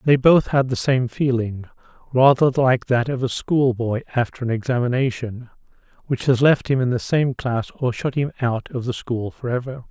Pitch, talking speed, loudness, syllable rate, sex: 125 Hz, 190 wpm, -20 LUFS, 4.9 syllables/s, male